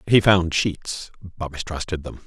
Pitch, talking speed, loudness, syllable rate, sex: 85 Hz, 160 wpm, -23 LUFS, 4.4 syllables/s, male